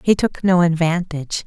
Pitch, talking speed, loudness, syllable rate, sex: 170 Hz, 165 wpm, -18 LUFS, 5.1 syllables/s, female